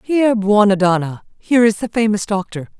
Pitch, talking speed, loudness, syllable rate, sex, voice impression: 210 Hz, 170 wpm, -16 LUFS, 5.6 syllables/s, female, very feminine, very adult-like, middle-aged, thin, slightly tensed, slightly powerful, bright, hard, very clear, fluent, cool, intellectual, very sincere, slightly calm, slightly friendly, reassuring, very elegant, kind